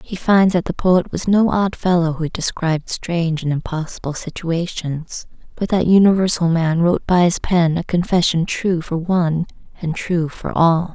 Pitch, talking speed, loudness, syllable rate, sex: 170 Hz, 175 wpm, -18 LUFS, 4.7 syllables/s, female